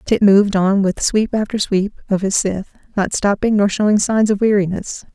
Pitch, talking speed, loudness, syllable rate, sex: 200 Hz, 200 wpm, -16 LUFS, 5.1 syllables/s, female